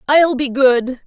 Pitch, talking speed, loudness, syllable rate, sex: 265 Hz, 170 wpm, -15 LUFS, 3.5 syllables/s, female